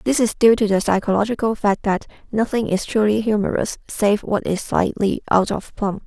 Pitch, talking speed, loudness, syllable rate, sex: 210 Hz, 190 wpm, -19 LUFS, 5.1 syllables/s, female